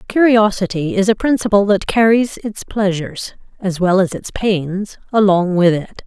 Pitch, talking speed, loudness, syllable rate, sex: 200 Hz, 160 wpm, -16 LUFS, 4.7 syllables/s, female